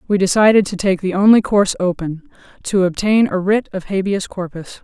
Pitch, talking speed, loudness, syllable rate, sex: 195 Hz, 185 wpm, -16 LUFS, 5.4 syllables/s, female